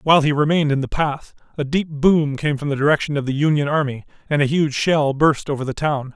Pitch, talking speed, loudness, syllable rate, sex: 145 Hz, 245 wpm, -19 LUFS, 5.9 syllables/s, male